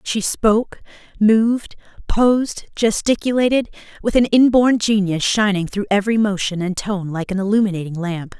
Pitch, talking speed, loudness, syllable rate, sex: 210 Hz, 135 wpm, -18 LUFS, 5.1 syllables/s, female